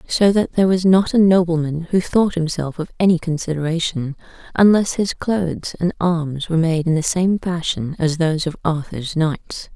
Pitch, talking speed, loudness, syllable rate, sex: 170 Hz, 180 wpm, -18 LUFS, 4.9 syllables/s, female